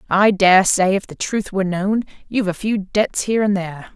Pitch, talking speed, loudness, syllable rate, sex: 195 Hz, 230 wpm, -18 LUFS, 5.5 syllables/s, female